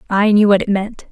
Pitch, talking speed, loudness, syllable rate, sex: 205 Hz, 270 wpm, -14 LUFS, 5.4 syllables/s, female